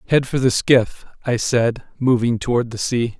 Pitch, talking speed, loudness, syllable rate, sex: 120 Hz, 190 wpm, -19 LUFS, 4.6 syllables/s, male